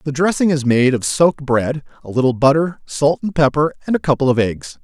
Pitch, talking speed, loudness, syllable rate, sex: 140 Hz, 225 wpm, -17 LUFS, 5.6 syllables/s, male